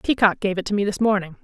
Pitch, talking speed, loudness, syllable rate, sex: 200 Hz, 290 wpm, -21 LUFS, 6.9 syllables/s, female